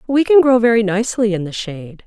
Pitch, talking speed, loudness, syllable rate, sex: 220 Hz, 230 wpm, -15 LUFS, 6.3 syllables/s, female